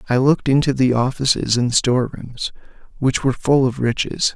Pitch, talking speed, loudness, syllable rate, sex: 130 Hz, 180 wpm, -18 LUFS, 5.4 syllables/s, male